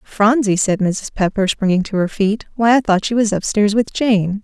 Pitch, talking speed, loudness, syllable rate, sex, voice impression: 210 Hz, 230 wpm, -16 LUFS, 4.8 syllables/s, female, feminine, very adult-like, soft, sincere, very calm, very elegant, slightly kind